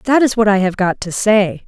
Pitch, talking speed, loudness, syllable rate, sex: 210 Hz, 285 wpm, -15 LUFS, 5.3 syllables/s, female